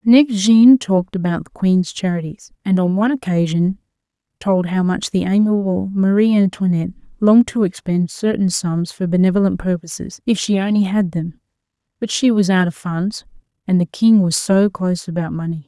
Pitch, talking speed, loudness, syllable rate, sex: 190 Hz, 170 wpm, -17 LUFS, 5.3 syllables/s, female